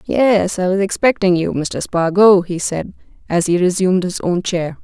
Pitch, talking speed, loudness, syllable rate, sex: 185 Hz, 185 wpm, -16 LUFS, 4.6 syllables/s, female